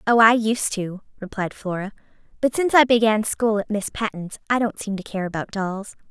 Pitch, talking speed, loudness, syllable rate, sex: 215 Hz, 205 wpm, -21 LUFS, 5.3 syllables/s, female